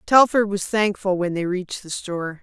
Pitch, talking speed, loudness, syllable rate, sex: 190 Hz, 200 wpm, -21 LUFS, 5.2 syllables/s, female